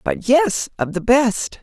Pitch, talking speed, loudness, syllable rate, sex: 225 Hz, 185 wpm, -18 LUFS, 3.5 syllables/s, female